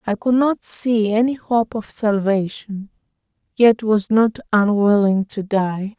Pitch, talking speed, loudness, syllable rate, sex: 215 Hz, 140 wpm, -18 LUFS, 3.7 syllables/s, female